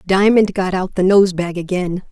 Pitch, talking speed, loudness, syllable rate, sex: 185 Hz, 200 wpm, -16 LUFS, 4.6 syllables/s, female